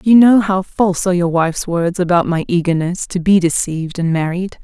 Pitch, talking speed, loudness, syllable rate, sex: 180 Hz, 205 wpm, -15 LUFS, 5.5 syllables/s, female